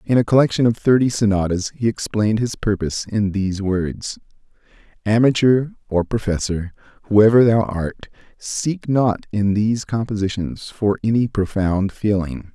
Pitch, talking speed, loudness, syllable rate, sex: 105 Hz, 135 wpm, -19 LUFS, 4.8 syllables/s, male